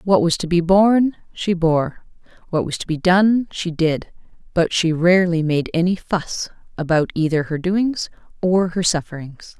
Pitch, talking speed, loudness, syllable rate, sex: 175 Hz, 155 wpm, -19 LUFS, 4.5 syllables/s, female